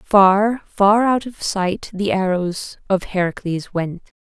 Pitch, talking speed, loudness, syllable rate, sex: 195 Hz, 140 wpm, -19 LUFS, 3.4 syllables/s, female